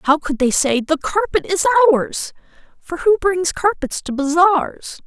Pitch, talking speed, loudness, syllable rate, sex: 335 Hz, 165 wpm, -17 LUFS, 4.0 syllables/s, female